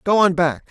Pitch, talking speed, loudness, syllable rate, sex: 175 Hz, 255 wpm, -17 LUFS, 5.0 syllables/s, male